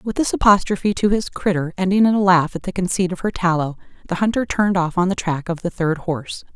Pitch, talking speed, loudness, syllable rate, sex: 185 Hz, 245 wpm, -19 LUFS, 6.1 syllables/s, female